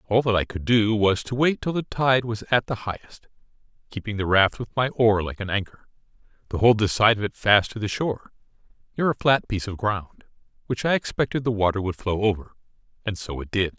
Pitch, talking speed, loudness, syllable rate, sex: 110 Hz, 225 wpm, -23 LUFS, 5.7 syllables/s, male